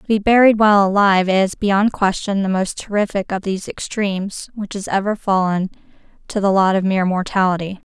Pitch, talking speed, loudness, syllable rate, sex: 195 Hz, 180 wpm, -17 LUFS, 5.6 syllables/s, female